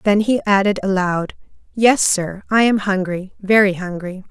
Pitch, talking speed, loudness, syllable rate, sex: 195 Hz, 140 wpm, -17 LUFS, 4.5 syllables/s, female